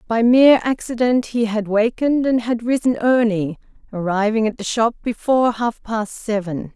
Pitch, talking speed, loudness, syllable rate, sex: 230 Hz, 160 wpm, -18 LUFS, 4.9 syllables/s, female